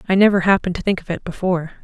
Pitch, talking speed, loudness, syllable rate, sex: 185 Hz, 260 wpm, -18 LUFS, 8.3 syllables/s, female